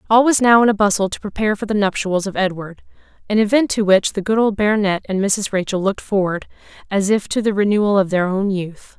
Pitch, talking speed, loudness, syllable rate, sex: 200 Hz, 235 wpm, -17 LUFS, 6.1 syllables/s, female